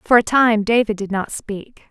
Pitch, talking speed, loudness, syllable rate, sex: 220 Hz, 220 wpm, -17 LUFS, 4.4 syllables/s, female